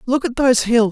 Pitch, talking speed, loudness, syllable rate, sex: 240 Hz, 260 wpm, -16 LUFS, 6.1 syllables/s, female